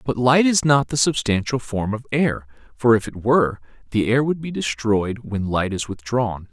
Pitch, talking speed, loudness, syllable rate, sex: 120 Hz, 200 wpm, -20 LUFS, 4.7 syllables/s, male